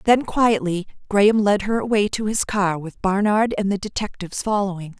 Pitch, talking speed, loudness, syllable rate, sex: 200 Hz, 180 wpm, -20 LUFS, 5.2 syllables/s, female